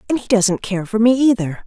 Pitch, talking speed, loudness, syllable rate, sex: 215 Hz, 255 wpm, -16 LUFS, 5.7 syllables/s, female